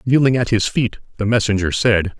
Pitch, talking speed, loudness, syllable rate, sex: 110 Hz, 190 wpm, -17 LUFS, 5.4 syllables/s, male